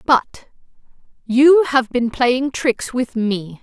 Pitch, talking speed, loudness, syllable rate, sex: 250 Hz, 115 wpm, -17 LUFS, 3.0 syllables/s, female